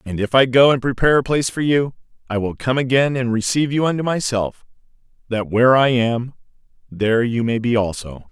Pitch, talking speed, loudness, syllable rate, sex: 120 Hz, 200 wpm, -18 LUFS, 5.9 syllables/s, male